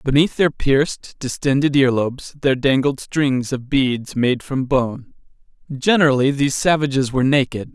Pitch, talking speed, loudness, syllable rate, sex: 135 Hz, 140 wpm, -18 LUFS, 4.9 syllables/s, male